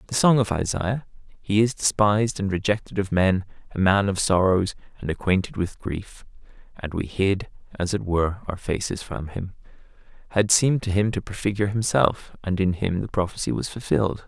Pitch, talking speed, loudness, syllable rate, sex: 100 Hz, 180 wpm, -23 LUFS, 5.4 syllables/s, male